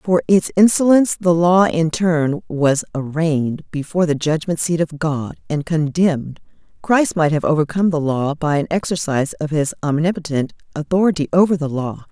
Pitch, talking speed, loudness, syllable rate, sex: 160 Hz, 165 wpm, -18 LUFS, 5.1 syllables/s, female